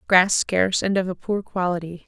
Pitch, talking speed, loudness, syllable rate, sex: 185 Hz, 200 wpm, -22 LUFS, 5.2 syllables/s, female